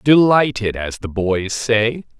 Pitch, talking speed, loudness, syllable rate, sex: 115 Hz, 135 wpm, -17 LUFS, 3.4 syllables/s, male